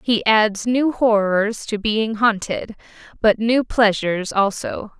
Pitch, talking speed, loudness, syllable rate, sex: 215 Hz, 130 wpm, -19 LUFS, 3.6 syllables/s, female